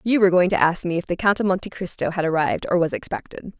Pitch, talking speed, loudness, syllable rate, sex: 180 Hz, 285 wpm, -21 LUFS, 7.0 syllables/s, female